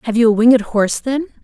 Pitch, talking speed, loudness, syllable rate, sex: 235 Hz, 250 wpm, -14 LUFS, 7.0 syllables/s, female